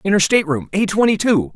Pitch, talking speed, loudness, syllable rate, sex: 185 Hz, 195 wpm, -16 LUFS, 6.3 syllables/s, male